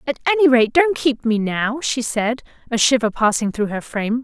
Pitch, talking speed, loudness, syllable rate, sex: 245 Hz, 215 wpm, -18 LUFS, 5.2 syllables/s, female